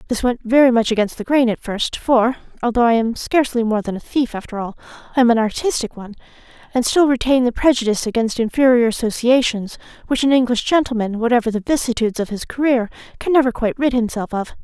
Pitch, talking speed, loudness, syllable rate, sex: 240 Hz, 200 wpm, -18 LUFS, 6.5 syllables/s, female